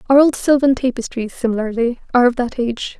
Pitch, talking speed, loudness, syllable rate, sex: 245 Hz, 180 wpm, -17 LUFS, 6.4 syllables/s, female